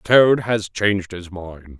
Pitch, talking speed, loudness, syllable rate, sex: 100 Hz, 165 wpm, -18 LUFS, 3.8 syllables/s, male